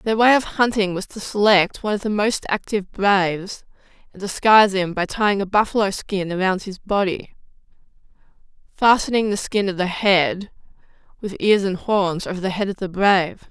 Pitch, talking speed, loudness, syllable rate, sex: 195 Hz, 180 wpm, -19 LUFS, 5.3 syllables/s, female